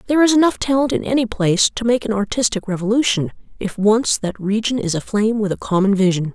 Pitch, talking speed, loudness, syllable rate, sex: 215 Hz, 210 wpm, -18 LUFS, 6.3 syllables/s, female